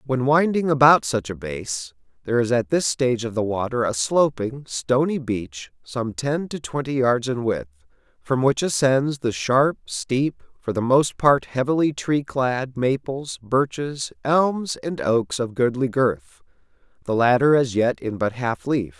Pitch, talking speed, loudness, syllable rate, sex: 125 Hz, 165 wpm, -22 LUFS, 4.1 syllables/s, male